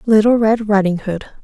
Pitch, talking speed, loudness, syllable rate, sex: 210 Hz, 165 wpm, -15 LUFS, 5.2 syllables/s, female